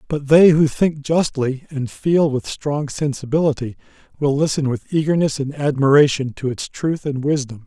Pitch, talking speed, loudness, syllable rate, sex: 145 Hz, 165 wpm, -18 LUFS, 4.8 syllables/s, male